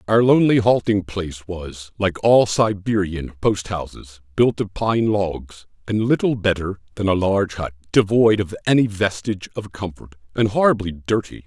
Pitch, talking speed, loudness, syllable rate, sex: 100 Hz, 155 wpm, -20 LUFS, 4.8 syllables/s, male